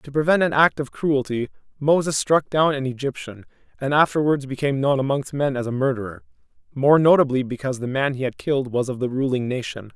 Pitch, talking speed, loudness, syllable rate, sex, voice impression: 135 Hz, 200 wpm, -21 LUFS, 6.0 syllables/s, male, masculine, adult-like, clear, refreshing, friendly, reassuring, elegant